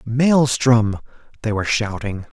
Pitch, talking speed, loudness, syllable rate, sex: 115 Hz, 100 wpm, -19 LUFS, 4.0 syllables/s, male